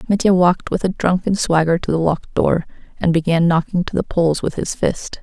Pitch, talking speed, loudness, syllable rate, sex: 175 Hz, 220 wpm, -18 LUFS, 5.8 syllables/s, female